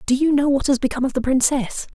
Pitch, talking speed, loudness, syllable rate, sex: 270 Hz, 270 wpm, -19 LUFS, 6.8 syllables/s, female